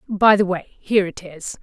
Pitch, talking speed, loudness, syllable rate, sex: 190 Hz, 220 wpm, -19 LUFS, 4.9 syllables/s, female